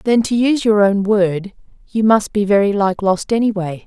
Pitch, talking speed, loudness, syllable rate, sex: 205 Hz, 200 wpm, -16 LUFS, 4.9 syllables/s, female